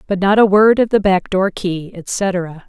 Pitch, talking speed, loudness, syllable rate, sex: 190 Hz, 225 wpm, -15 LUFS, 4.0 syllables/s, female